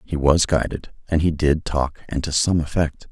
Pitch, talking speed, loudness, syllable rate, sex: 75 Hz, 210 wpm, -21 LUFS, 4.7 syllables/s, male